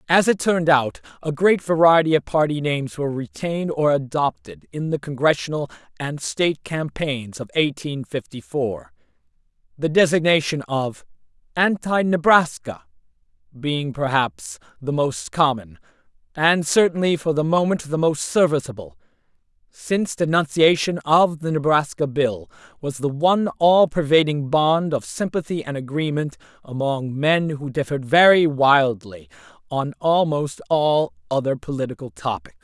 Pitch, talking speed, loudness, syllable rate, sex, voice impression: 150 Hz, 130 wpm, -20 LUFS, 4.7 syllables/s, male, very masculine, very adult-like, middle-aged, slightly thick, very tensed, powerful, bright, very hard, very clear, fluent, slightly cool, very intellectual, slightly refreshing, very sincere, calm, mature, slightly friendly, slightly reassuring, unique, slightly elegant, wild, very lively, strict, intense